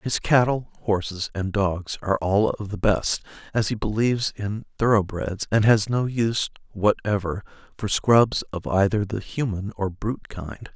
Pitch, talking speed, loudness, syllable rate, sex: 105 Hz, 160 wpm, -23 LUFS, 4.5 syllables/s, male